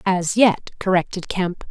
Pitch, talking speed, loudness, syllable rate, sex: 185 Hz, 140 wpm, -20 LUFS, 4.0 syllables/s, female